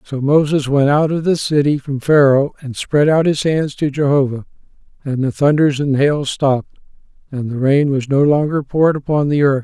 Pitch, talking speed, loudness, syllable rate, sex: 140 Hz, 200 wpm, -15 LUFS, 5.1 syllables/s, male